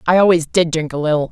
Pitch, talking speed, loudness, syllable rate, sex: 165 Hz, 275 wpm, -16 LUFS, 6.8 syllables/s, female